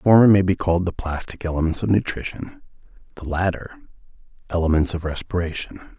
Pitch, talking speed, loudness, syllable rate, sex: 85 Hz, 150 wpm, -21 LUFS, 6.3 syllables/s, male